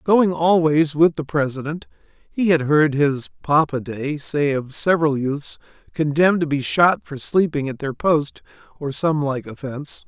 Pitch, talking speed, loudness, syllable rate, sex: 150 Hz, 165 wpm, -20 LUFS, 4.4 syllables/s, male